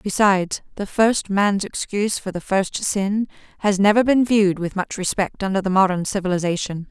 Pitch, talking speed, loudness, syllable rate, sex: 195 Hz, 175 wpm, -20 LUFS, 5.2 syllables/s, female